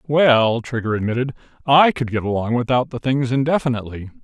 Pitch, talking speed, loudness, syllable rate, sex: 125 Hz, 155 wpm, -19 LUFS, 5.6 syllables/s, male